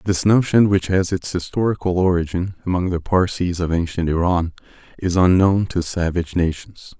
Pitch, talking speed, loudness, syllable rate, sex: 90 Hz, 155 wpm, -19 LUFS, 5.1 syllables/s, male